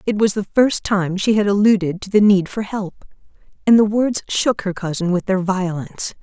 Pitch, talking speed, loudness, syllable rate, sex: 200 Hz, 210 wpm, -18 LUFS, 5.0 syllables/s, female